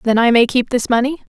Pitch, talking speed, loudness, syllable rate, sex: 245 Hz, 265 wpm, -15 LUFS, 6.1 syllables/s, female